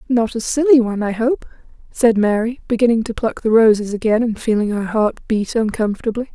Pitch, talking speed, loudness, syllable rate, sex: 225 Hz, 190 wpm, -17 LUFS, 5.8 syllables/s, female